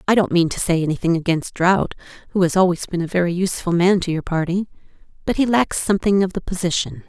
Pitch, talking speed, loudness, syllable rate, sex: 180 Hz, 210 wpm, -19 LUFS, 6.4 syllables/s, female